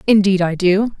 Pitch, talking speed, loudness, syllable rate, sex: 195 Hz, 180 wpm, -15 LUFS, 4.7 syllables/s, female